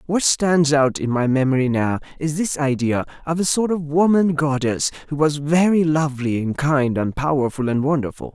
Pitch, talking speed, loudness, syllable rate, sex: 145 Hz, 185 wpm, -19 LUFS, 5.0 syllables/s, male